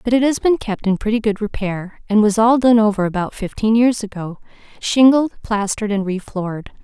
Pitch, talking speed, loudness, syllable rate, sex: 215 Hz, 195 wpm, -17 LUFS, 5.4 syllables/s, female